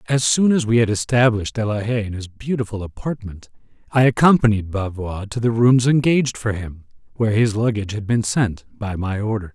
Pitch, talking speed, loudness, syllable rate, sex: 110 Hz, 195 wpm, -19 LUFS, 5.6 syllables/s, male